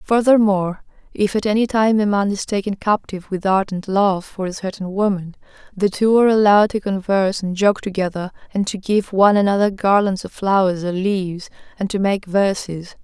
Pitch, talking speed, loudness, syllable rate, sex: 195 Hz, 185 wpm, -18 LUFS, 5.5 syllables/s, female